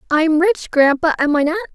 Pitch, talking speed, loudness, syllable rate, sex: 315 Hz, 240 wpm, -16 LUFS, 6.1 syllables/s, female